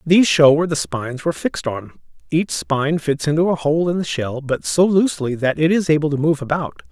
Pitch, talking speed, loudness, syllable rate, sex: 150 Hz, 235 wpm, -18 LUFS, 6.0 syllables/s, male